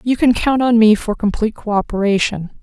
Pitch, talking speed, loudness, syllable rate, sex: 220 Hz, 185 wpm, -16 LUFS, 5.2 syllables/s, female